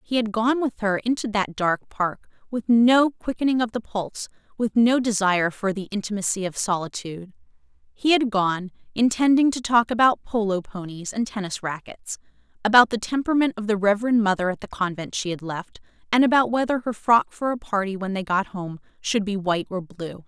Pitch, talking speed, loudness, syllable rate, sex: 215 Hz, 190 wpm, -23 LUFS, 5.4 syllables/s, female